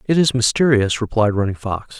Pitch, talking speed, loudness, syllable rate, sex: 120 Hz, 180 wpm, -18 LUFS, 5.3 syllables/s, male